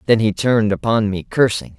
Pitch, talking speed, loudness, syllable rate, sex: 110 Hz, 200 wpm, -17 LUFS, 5.6 syllables/s, male